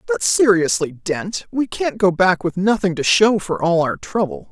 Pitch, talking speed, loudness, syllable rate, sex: 190 Hz, 200 wpm, -18 LUFS, 4.4 syllables/s, female